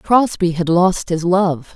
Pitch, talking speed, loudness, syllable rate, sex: 180 Hz, 170 wpm, -16 LUFS, 3.5 syllables/s, female